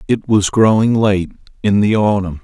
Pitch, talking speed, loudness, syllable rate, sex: 105 Hz, 175 wpm, -14 LUFS, 4.6 syllables/s, male